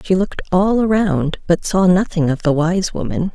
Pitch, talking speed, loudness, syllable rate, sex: 180 Hz, 195 wpm, -17 LUFS, 4.9 syllables/s, female